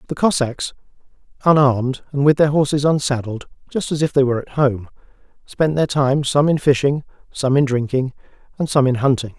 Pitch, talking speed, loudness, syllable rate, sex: 140 Hz, 180 wpm, -18 LUFS, 5.5 syllables/s, male